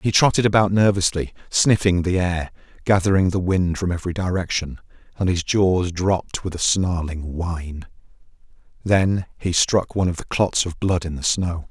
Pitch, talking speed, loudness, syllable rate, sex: 90 Hz, 170 wpm, -21 LUFS, 4.9 syllables/s, male